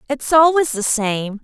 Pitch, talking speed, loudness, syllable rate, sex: 255 Hz, 165 wpm, -16 LUFS, 4.0 syllables/s, female